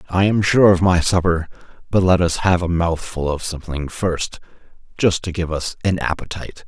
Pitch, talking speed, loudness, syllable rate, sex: 85 Hz, 190 wpm, -19 LUFS, 5.2 syllables/s, male